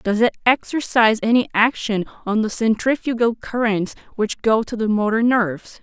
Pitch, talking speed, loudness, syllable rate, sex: 225 Hz, 155 wpm, -19 LUFS, 5.0 syllables/s, female